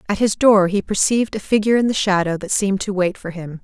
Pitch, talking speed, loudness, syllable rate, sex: 200 Hz, 265 wpm, -18 LUFS, 6.4 syllables/s, female